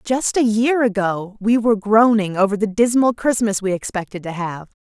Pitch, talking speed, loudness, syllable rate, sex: 215 Hz, 185 wpm, -18 LUFS, 5.0 syllables/s, female